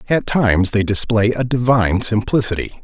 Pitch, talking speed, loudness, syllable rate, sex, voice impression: 110 Hz, 150 wpm, -17 LUFS, 5.5 syllables/s, male, very masculine, very adult-like, slightly thick, slightly intellectual, slightly friendly, slightly kind